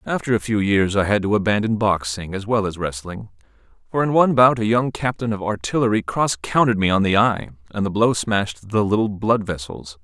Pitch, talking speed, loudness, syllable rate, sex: 105 Hz, 215 wpm, -20 LUFS, 5.7 syllables/s, male